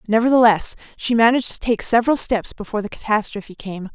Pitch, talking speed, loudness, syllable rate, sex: 220 Hz, 165 wpm, -18 LUFS, 6.4 syllables/s, female